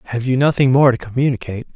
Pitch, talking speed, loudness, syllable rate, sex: 125 Hz, 205 wpm, -16 LUFS, 7.7 syllables/s, male